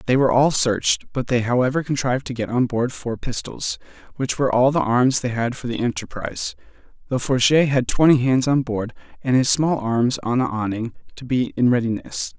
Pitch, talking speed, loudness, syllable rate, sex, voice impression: 125 Hz, 205 wpm, -20 LUFS, 5.5 syllables/s, male, very masculine, adult-like, slightly thick, cool, slightly refreshing, sincere